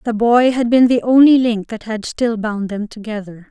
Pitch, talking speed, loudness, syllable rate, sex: 225 Hz, 225 wpm, -15 LUFS, 4.7 syllables/s, female